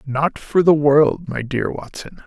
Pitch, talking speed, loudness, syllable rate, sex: 145 Hz, 185 wpm, -17 LUFS, 3.7 syllables/s, male